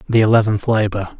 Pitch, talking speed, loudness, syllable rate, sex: 110 Hz, 150 wpm, -16 LUFS, 5.8 syllables/s, male